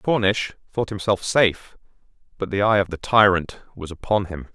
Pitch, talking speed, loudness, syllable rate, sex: 100 Hz, 170 wpm, -21 LUFS, 4.9 syllables/s, male